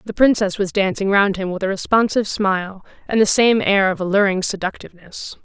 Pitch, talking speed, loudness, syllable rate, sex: 200 Hz, 190 wpm, -18 LUFS, 5.8 syllables/s, female